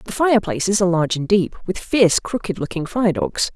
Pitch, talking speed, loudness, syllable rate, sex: 195 Hz, 205 wpm, -19 LUFS, 5.9 syllables/s, female